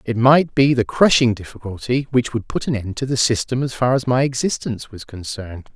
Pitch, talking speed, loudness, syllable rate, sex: 120 Hz, 220 wpm, -19 LUFS, 5.6 syllables/s, male